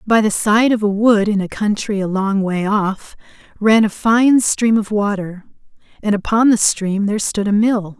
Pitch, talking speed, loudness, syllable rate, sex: 210 Hz, 205 wpm, -16 LUFS, 4.5 syllables/s, female